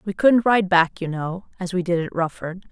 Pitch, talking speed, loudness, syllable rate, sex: 180 Hz, 245 wpm, -21 LUFS, 4.9 syllables/s, female